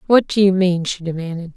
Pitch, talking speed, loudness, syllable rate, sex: 180 Hz, 230 wpm, -18 LUFS, 5.8 syllables/s, female